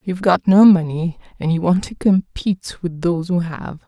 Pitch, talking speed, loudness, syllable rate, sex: 175 Hz, 200 wpm, -17 LUFS, 5.2 syllables/s, female